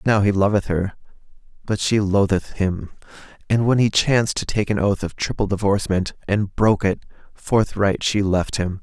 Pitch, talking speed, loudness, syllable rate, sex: 100 Hz, 175 wpm, -20 LUFS, 5.0 syllables/s, male